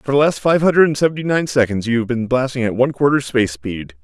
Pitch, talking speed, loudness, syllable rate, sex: 130 Hz, 270 wpm, -17 LUFS, 6.6 syllables/s, male